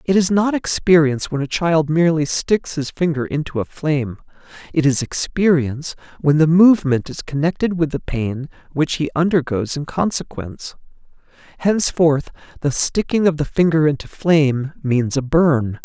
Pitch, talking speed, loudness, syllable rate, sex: 155 Hz, 155 wpm, -18 LUFS, 5.0 syllables/s, male